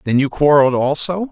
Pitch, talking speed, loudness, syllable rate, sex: 150 Hz, 185 wpm, -15 LUFS, 5.9 syllables/s, male